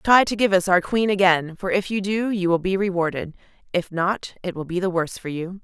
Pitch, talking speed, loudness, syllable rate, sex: 185 Hz, 255 wpm, -22 LUFS, 5.5 syllables/s, female